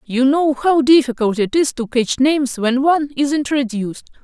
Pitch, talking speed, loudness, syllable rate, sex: 270 Hz, 185 wpm, -16 LUFS, 5.1 syllables/s, female